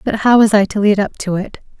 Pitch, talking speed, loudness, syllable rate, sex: 205 Hz, 300 wpm, -14 LUFS, 5.8 syllables/s, female